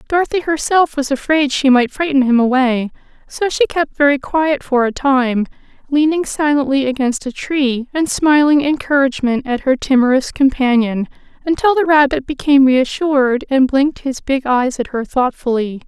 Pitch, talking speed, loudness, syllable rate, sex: 275 Hz, 160 wpm, -15 LUFS, 4.9 syllables/s, female